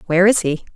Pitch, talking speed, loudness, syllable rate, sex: 185 Hz, 240 wpm, -16 LUFS, 8.3 syllables/s, female